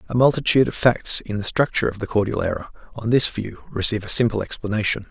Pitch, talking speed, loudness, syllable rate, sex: 110 Hz, 200 wpm, -21 LUFS, 6.8 syllables/s, male